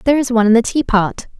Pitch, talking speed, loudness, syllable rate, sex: 235 Hz, 300 wpm, -15 LUFS, 7.6 syllables/s, female